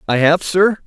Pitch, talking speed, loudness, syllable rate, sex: 170 Hz, 210 wpm, -15 LUFS, 4.4 syllables/s, male